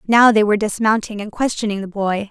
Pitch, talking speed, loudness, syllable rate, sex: 210 Hz, 210 wpm, -17 LUFS, 6.1 syllables/s, female